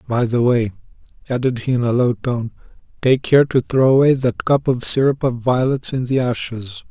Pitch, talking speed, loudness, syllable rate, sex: 125 Hz, 200 wpm, -18 LUFS, 5.0 syllables/s, male